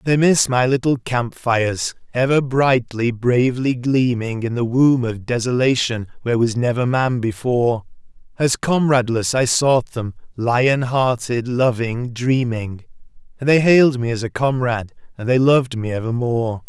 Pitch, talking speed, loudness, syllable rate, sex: 125 Hz, 145 wpm, -18 LUFS, 4.6 syllables/s, male